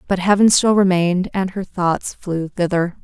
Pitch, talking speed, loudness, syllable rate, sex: 185 Hz, 180 wpm, -17 LUFS, 4.6 syllables/s, female